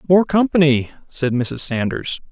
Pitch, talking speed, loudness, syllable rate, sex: 150 Hz, 130 wpm, -18 LUFS, 4.3 syllables/s, male